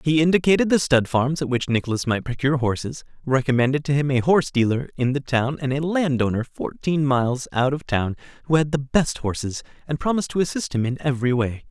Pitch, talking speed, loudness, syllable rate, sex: 135 Hz, 210 wpm, -22 LUFS, 6.0 syllables/s, male